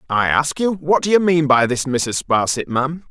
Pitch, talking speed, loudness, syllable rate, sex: 145 Hz, 230 wpm, -17 LUFS, 4.9 syllables/s, male